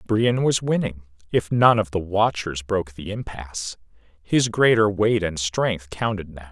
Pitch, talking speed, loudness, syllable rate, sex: 100 Hz, 155 wpm, -22 LUFS, 4.4 syllables/s, male